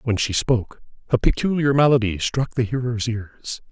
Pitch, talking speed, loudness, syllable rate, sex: 120 Hz, 160 wpm, -21 LUFS, 4.9 syllables/s, male